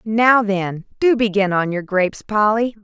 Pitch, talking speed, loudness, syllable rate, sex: 210 Hz, 170 wpm, -17 LUFS, 4.3 syllables/s, female